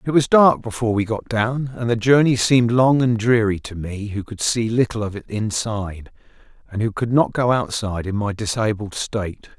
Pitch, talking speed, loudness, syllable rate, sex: 110 Hz, 205 wpm, -20 LUFS, 5.3 syllables/s, male